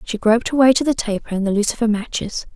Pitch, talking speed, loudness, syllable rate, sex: 230 Hz, 260 wpm, -18 LUFS, 6.7 syllables/s, female